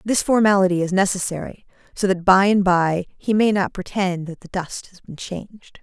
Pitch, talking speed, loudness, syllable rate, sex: 190 Hz, 195 wpm, -19 LUFS, 5.0 syllables/s, female